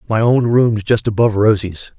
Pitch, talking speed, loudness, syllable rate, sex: 110 Hz, 180 wpm, -15 LUFS, 5.1 syllables/s, male